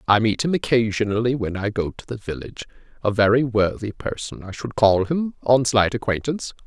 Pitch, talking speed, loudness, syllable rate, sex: 115 Hz, 190 wpm, -21 LUFS, 5.6 syllables/s, male